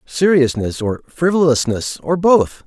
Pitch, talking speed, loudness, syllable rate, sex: 140 Hz, 115 wpm, -16 LUFS, 4.0 syllables/s, male